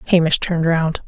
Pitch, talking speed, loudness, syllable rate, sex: 170 Hz, 165 wpm, -17 LUFS, 6.2 syllables/s, female